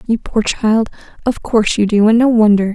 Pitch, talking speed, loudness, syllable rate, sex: 220 Hz, 220 wpm, -14 LUFS, 5.4 syllables/s, female